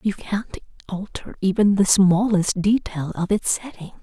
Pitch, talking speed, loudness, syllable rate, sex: 195 Hz, 150 wpm, -20 LUFS, 4.3 syllables/s, female